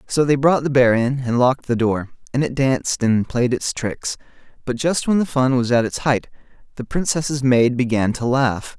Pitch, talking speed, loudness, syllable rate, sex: 130 Hz, 220 wpm, -19 LUFS, 4.8 syllables/s, male